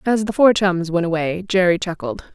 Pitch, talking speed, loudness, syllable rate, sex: 185 Hz, 205 wpm, -18 LUFS, 5.0 syllables/s, female